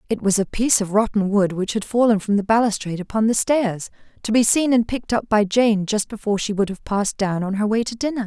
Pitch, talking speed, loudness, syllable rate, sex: 215 Hz, 260 wpm, -20 LUFS, 6.2 syllables/s, female